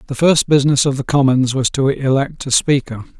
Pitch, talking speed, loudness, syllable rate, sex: 135 Hz, 205 wpm, -15 LUFS, 5.5 syllables/s, male